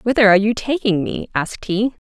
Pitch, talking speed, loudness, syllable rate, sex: 215 Hz, 205 wpm, -18 LUFS, 6.0 syllables/s, female